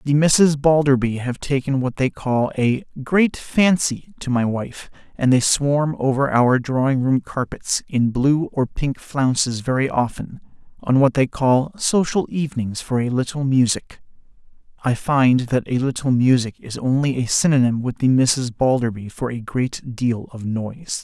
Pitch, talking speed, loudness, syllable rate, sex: 130 Hz, 170 wpm, -19 LUFS, 4.4 syllables/s, male